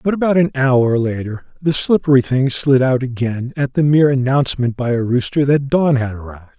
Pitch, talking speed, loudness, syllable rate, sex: 135 Hz, 200 wpm, -16 LUFS, 5.5 syllables/s, male